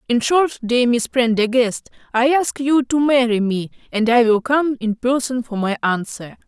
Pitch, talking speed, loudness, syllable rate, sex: 245 Hz, 185 wpm, -18 LUFS, 4.4 syllables/s, female